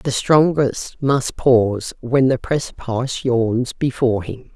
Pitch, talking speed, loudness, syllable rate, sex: 125 Hz, 130 wpm, -18 LUFS, 3.8 syllables/s, female